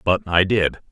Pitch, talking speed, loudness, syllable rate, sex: 105 Hz, 195 wpm, -18 LUFS, 4.7 syllables/s, male